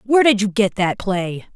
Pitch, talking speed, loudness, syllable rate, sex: 205 Hz, 230 wpm, -18 LUFS, 4.8 syllables/s, female